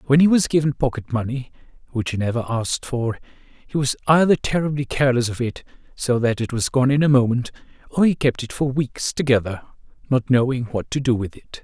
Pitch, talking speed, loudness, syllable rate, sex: 130 Hz, 205 wpm, -21 LUFS, 5.7 syllables/s, male